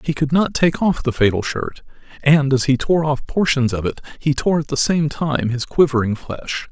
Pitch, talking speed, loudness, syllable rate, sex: 140 Hz, 225 wpm, -18 LUFS, 4.8 syllables/s, male